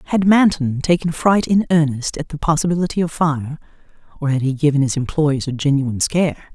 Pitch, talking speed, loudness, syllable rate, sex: 155 Hz, 185 wpm, -18 LUFS, 5.8 syllables/s, female